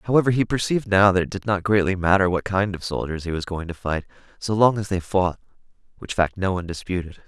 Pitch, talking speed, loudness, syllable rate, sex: 95 Hz, 240 wpm, -22 LUFS, 6.2 syllables/s, male